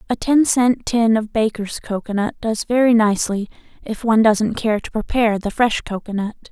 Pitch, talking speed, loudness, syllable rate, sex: 220 Hz, 175 wpm, -18 LUFS, 5.1 syllables/s, female